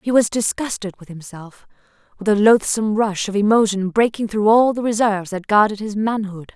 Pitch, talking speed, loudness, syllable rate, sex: 210 Hz, 185 wpm, -18 LUFS, 5.5 syllables/s, female